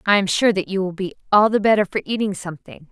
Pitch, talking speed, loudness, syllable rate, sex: 195 Hz, 265 wpm, -19 LUFS, 6.6 syllables/s, female